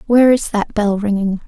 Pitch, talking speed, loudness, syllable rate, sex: 215 Hz, 205 wpm, -16 LUFS, 5.5 syllables/s, female